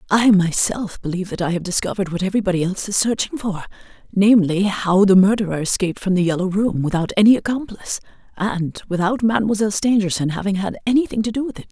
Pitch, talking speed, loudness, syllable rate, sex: 200 Hz, 185 wpm, -19 LUFS, 6.7 syllables/s, female